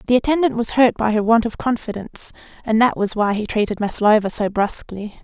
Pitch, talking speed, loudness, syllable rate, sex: 220 Hz, 205 wpm, -19 LUFS, 6.0 syllables/s, female